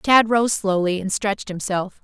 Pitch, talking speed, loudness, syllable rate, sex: 200 Hz, 175 wpm, -20 LUFS, 4.5 syllables/s, female